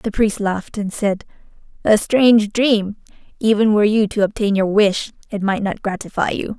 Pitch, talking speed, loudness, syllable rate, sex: 210 Hz, 180 wpm, -18 LUFS, 5.0 syllables/s, female